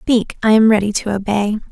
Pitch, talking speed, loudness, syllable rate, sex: 210 Hz, 210 wpm, -15 LUFS, 5.3 syllables/s, female